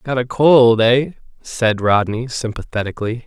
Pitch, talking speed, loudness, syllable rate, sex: 120 Hz, 130 wpm, -16 LUFS, 4.6 syllables/s, male